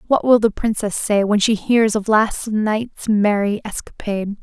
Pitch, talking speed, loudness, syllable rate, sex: 215 Hz, 175 wpm, -18 LUFS, 4.3 syllables/s, female